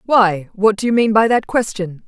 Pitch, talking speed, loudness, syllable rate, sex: 210 Hz, 200 wpm, -16 LUFS, 5.0 syllables/s, female